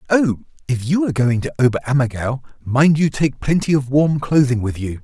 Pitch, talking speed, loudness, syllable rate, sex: 140 Hz, 205 wpm, -18 LUFS, 5.4 syllables/s, male